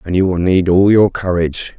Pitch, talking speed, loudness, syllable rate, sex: 90 Hz, 235 wpm, -14 LUFS, 5.4 syllables/s, male